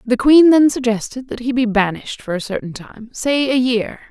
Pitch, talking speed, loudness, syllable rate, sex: 240 Hz, 220 wpm, -16 LUFS, 5.1 syllables/s, female